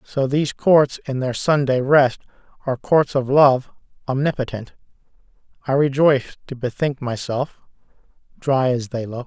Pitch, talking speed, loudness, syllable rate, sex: 135 Hz, 135 wpm, -19 LUFS, 4.8 syllables/s, male